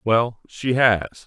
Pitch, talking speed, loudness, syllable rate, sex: 115 Hz, 140 wpm, -20 LUFS, 2.7 syllables/s, male